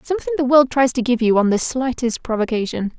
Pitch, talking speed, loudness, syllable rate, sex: 250 Hz, 220 wpm, -18 LUFS, 6.2 syllables/s, female